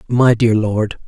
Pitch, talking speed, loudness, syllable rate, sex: 115 Hz, 165 wpm, -15 LUFS, 3.5 syllables/s, male